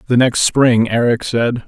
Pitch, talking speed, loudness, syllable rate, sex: 120 Hz, 180 wpm, -14 LUFS, 4.1 syllables/s, male